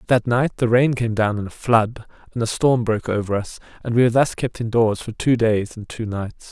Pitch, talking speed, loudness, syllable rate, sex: 115 Hz, 260 wpm, -20 LUFS, 5.4 syllables/s, male